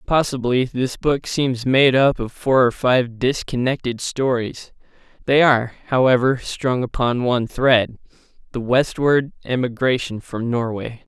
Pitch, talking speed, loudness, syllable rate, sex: 125 Hz, 125 wpm, -19 LUFS, 4.2 syllables/s, male